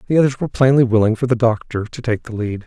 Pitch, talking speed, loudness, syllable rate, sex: 120 Hz, 270 wpm, -17 LUFS, 6.9 syllables/s, male